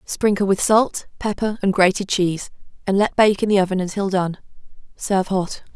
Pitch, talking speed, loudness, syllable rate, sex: 195 Hz, 175 wpm, -19 LUFS, 5.3 syllables/s, female